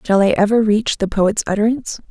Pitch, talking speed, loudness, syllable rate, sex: 210 Hz, 200 wpm, -16 LUFS, 5.8 syllables/s, female